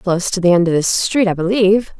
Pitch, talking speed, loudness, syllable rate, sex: 190 Hz, 270 wpm, -15 LUFS, 6.2 syllables/s, female